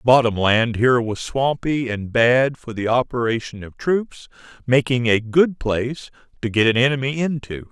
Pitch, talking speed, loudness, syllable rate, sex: 125 Hz, 170 wpm, -19 LUFS, 4.8 syllables/s, male